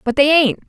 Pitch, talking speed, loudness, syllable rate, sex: 270 Hz, 265 wpm, -13 LUFS, 5.8 syllables/s, female